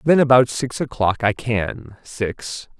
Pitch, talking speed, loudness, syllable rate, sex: 120 Hz, 150 wpm, -20 LUFS, 3.5 syllables/s, male